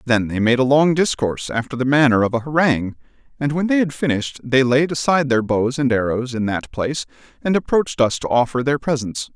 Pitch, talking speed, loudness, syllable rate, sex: 130 Hz, 220 wpm, -19 LUFS, 6.0 syllables/s, male